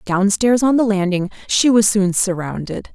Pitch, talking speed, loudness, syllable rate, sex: 205 Hz, 165 wpm, -16 LUFS, 4.5 syllables/s, female